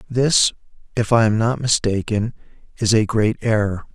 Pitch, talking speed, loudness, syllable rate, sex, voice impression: 110 Hz, 150 wpm, -19 LUFS, 4.6 syllables/s, male, very masculine, very adult-like, very middle-aged, thick, relaxed, slightly weak, dark, soft, slightly muffled, slightly fluent, cool, intellectual, slightly refreshing, sincere, very calm, mature, friendly, reassuring, slightly unique, slightly elegant, slightly wild, sweet, very kind, very modest